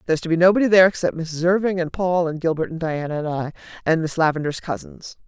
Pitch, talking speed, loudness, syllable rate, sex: 165 Hz, 230 wpm, -20 LUFS, 6.6 syllables/s, female